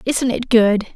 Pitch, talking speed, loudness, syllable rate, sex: 230 Hz, 190 wpm, -16 LUFS, 4.0 syllables/s, female